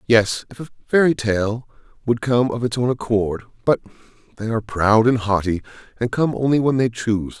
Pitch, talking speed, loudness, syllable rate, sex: 115 Hz, 185 wpm, -20 LUFS, 5.3 syllables/s, male